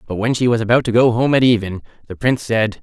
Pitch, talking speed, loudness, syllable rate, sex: 115 Hz, 275 wpm, -16 LUFS, 6.6 syllables/s, male